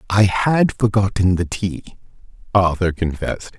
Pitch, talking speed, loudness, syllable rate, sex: 100 Hz, 115 wpm, -18 LUFS, 4.5 syllables/s, male